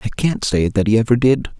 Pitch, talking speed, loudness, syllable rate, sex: 115 Hz, 265 wpm, -17 LUFS, 5.9 syllables/s, male